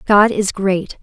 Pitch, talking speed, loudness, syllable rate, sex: 200 Hz, 175 wpm, -16 LUFS, 3.3 syllables/s, female